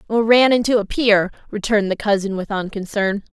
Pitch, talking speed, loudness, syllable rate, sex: 210 Hz, 160 wpm, -18 LUFS, 5.2 syllables/s, female